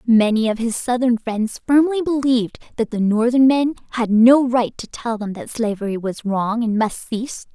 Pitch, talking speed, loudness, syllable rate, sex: 235 Hz, 190 wpm, -19 LUFS, 4.8 syllables/s, female